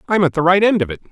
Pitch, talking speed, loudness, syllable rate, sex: 175 Hz, 375 wpm, -15 LUFS, 8.0 syllables/s, male